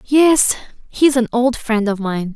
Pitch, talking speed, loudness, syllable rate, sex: 240 Hz, 205 wpm, -16 LUFS, 4.2 syllables/s, female